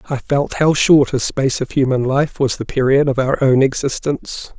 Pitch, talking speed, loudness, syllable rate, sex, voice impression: 135 Hz, 210 wpm, -16 LUFS, 5.1 syllables/s, male, masculine, middle-aged, slightly relaxed, powerful, slightly halting, raspy, slightly mature, friendly, slightly reassuring, wild, kind, modest